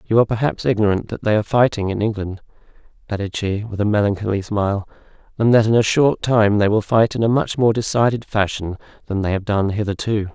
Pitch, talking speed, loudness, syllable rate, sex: 105 Hz, 210 wpm, -19 LUFS, 6.2 syllables/s, male